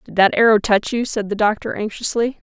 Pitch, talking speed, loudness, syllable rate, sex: 215 Hz, 215 wpm, -18 LUFS, 5.6 syllables/s, female